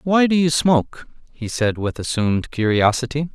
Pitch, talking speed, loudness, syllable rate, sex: 135 Hz, 160 wpm, -19 LUFS, 5.0 syllables/s, male